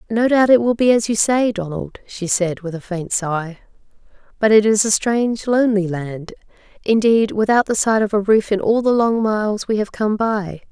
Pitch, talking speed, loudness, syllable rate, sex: 210 Hz, 215 wpm, -17 LUFS, 5.0 syllables/s, female